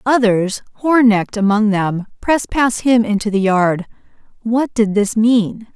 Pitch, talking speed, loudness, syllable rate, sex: 220 Hz, 145 wpm, -16 LUFS, 4.1 syllables/s, female